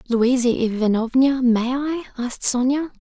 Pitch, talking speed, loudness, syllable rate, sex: 250 Hz, 120 wpm, -20 LUFS, 4.4 syllables/s, female